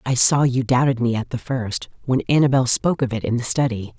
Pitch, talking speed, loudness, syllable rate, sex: 125 Hz, 240 wpm, -20 LUFS, 5.8 syllables/s, female